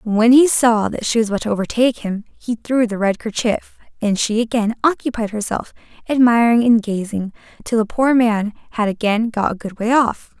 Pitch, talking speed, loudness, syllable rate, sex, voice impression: 225 Hz, 195 wpm, -18 LUFS, 5.3 syllables/s, female, feminine, adult-like, tensed, powerful, slightly soft, fluent, slightly raspy, intellectual, friendly, elegant, lively, slightly intense